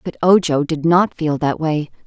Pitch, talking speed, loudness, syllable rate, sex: 160 Hz, 205 wpm, -17 LUFS, 4.5 syllables/s, female